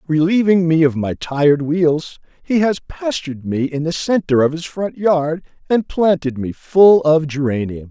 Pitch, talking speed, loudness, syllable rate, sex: 160 Hz, 175 wpm, -17 LUFS, 4.4 syllables/s, male